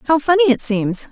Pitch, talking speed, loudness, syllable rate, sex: 275 Hz, 215 wpm, -16 LUFS, 4.7 syllables/s, female